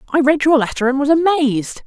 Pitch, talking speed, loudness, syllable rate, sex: 280 Hz, 225 wpm, -15 LUFS, 5.9 syllables/s, female